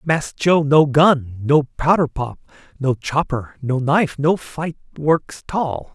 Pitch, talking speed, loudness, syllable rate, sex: 145 Hz, 150 wpm, -19 LUFS, 3.5 syllables/s, male